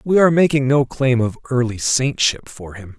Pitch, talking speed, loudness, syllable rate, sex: 130 Hz, 200 wpm, -17 LUFS, 5.0 syllables/s, male